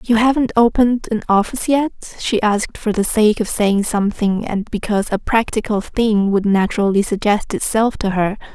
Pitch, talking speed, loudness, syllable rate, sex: 215 Hz, 175 wpm, -17 LUFS, 5.2 syllables/s, female